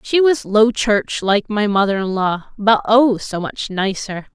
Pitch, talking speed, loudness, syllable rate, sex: 210 Hz, 195 wpm, -17 LUFS, 3.9 syllables/s, female